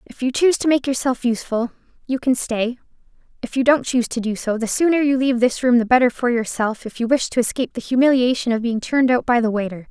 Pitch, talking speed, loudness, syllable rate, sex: 245 Hz, 250 wpm, -19 LUFS, 6.5 syllables/s, female